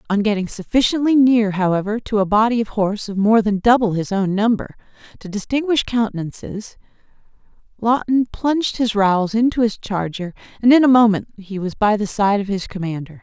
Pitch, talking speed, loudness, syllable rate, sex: 215 Hz, 175 wpm, -18 LUFS, 5.6 syllables/s, female